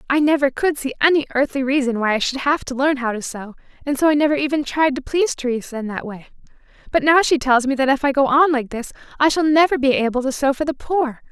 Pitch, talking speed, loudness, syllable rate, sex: 275 Hz, 265 wpm, -18 LUFS, 6.3 syllables/s, female